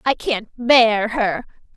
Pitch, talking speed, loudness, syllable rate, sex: 230 Hz, 135 wpm, -17 LUFS, 2.9 syllables/s, female